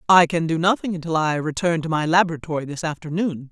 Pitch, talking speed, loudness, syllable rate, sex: 165 Hz, 205 wpm, -21 LUFS, 6.3 syllables/s, female